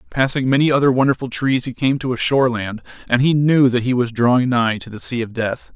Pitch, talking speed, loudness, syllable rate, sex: 125 Hz, 240 wpm, -18 LUFS, 5.9 syllables/s, male